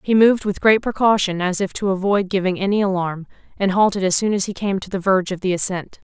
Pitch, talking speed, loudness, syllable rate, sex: 195 Hz, 245 wpm, -19 LUFS, 6.2 syllables/s, female